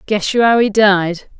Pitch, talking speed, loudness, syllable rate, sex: 205 Hz, 215 wpm, -13 LUFS, 4.2 syllables/s, female